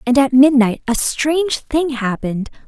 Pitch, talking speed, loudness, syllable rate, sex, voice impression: 265 Hz, 155 wpm, -16 LUFS, 4.6 syllables/s, female, feminine, adult-like, tensed, powerful, bright, slightly nasal, slightly cute, intellectual, slightly reassuring, elegant, lively, slightly sharp